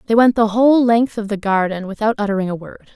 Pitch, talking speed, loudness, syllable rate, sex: 215 Hz, 245 wpm, -16 LUFS, 6.6 syllables/s, female